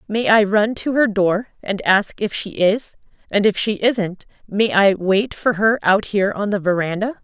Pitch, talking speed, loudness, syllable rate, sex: 205 Hz, 200 wpm, -18 LUFS, 4.4 syllables/s, female